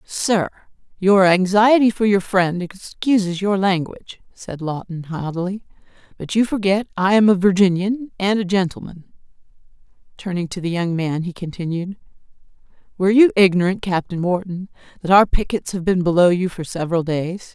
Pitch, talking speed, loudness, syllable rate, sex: 190 Hz, 150 wpm, -18 LUFS, 5.1 syllables/s, female